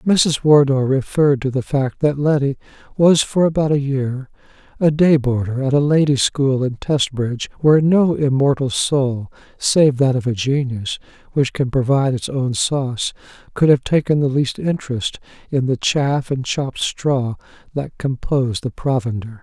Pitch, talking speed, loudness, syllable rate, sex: 135 Hz, 160 wpm, -18 LUFS, 4.6 syllables/s, male